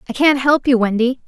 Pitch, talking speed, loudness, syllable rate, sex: 255 Hz, 235 wpm, -15 LUFS, 5.8 syllables/s, female